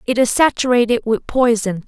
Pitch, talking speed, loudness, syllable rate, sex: 235 Hz, 160 wpm, -16 LUFS, 5.3 syllables/s, female